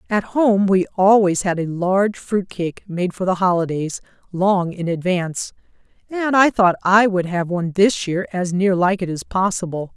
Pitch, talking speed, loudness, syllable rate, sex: 185 Hz, 185 wpm, -19 LUFS, 4.6 syllables/s, female